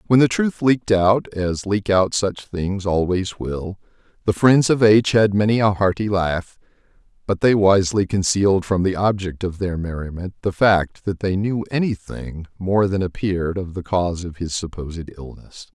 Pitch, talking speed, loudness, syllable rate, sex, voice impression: 95 Hz, 180 wpm, -20 LUFS, 4.7 syllables/s, male, masculine, adult-like, thick, tensed, powerful, slightly hard, slightly muffled, raspy, cool, intellectual, calm, mature, reassuring, wild, lively, kind